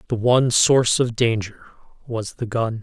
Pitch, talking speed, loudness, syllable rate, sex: 115 Hz, 170 wpm, -19 LUFS, 5.0 syllables/s, male